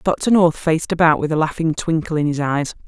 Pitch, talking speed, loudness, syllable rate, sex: 160 Hz, 230 wpm, -18 LUFS, 5.6 syllables/s, female